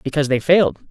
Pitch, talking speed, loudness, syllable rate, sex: 140 Hz, 200 wpm, -16 LUFS, 8.2 syllables/s, male